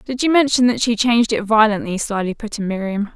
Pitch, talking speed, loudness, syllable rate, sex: 220 Hz, 230 wpm, -17 LUFS, 5.9 syllables/s, female